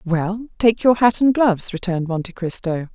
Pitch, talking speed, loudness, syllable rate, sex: 200 Hz, 185 wpm, -19 LUFS, 5.1 syllables/s, female